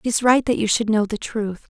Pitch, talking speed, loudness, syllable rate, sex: 220 Hz, 310 wpm, -20 LUFS, 5.7 syllables/s, female